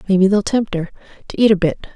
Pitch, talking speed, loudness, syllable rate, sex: 195 Hz, 245 wpm, -17 LUFS, 6.6 syllables/s, female